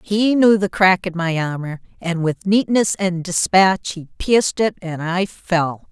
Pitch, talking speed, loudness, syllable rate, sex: 185 Hz, 185 wpm, -18 LUFS, 4.0 syllables/s, female